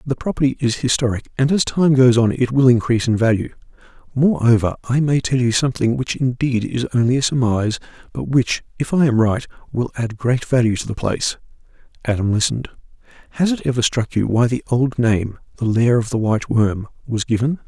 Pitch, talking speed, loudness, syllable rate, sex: 120 Hz, 195 wpm, -18 LUFS, 5.8 syllables/s, male